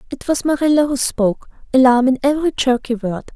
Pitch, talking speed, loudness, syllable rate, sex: 260 Hz, 180 wpm, -17 LUFS, 6.1 syllables/s, female